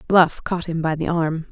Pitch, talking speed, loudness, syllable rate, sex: 165 Hz, 240 wpm, -21 LUFS, 4.6 syllables/s, female